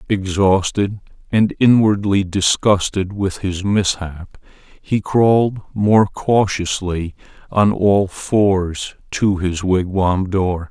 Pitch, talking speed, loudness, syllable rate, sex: 100 Hz, 100 wpm, -17 LUFS, 3.2 syllables/s, male